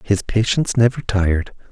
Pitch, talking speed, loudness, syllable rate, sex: 105 Hz, 140 wpm, -18 LUFS, 5.4 syllables/s, male